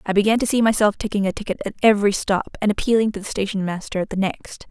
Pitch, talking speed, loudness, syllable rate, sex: 205 Hz, 255 wpm, -20 LUFS, 6.8 syllables/s, female